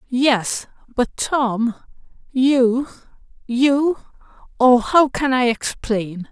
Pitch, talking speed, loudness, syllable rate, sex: 250 Hz, 75 wpm, -19 LUFS, 2.6 syllables/s, female